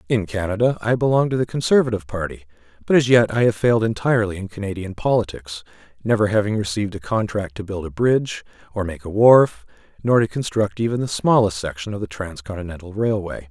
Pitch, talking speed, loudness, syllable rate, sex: 105 Hz, 185 wpm, -20 LUFS, 6.2 syllables/s, male